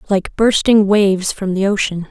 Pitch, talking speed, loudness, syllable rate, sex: 200 Hz, 170 wpm, -15 LUFS, 4.7 syllables/s, female